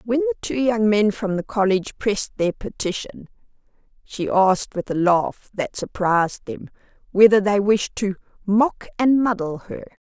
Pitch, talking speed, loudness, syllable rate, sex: 210 Hz, 160 wpm, -20 LUFS, 4.7 syllables/s, female